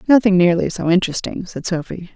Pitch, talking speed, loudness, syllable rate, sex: 185 Hz, 165 wpm, -18 LUFS, 6.1 syllables/s, female